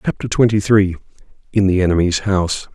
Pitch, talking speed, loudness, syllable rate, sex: 95 Hz, 130 wpm, -16 LUFS, 5.9 syllables/s, male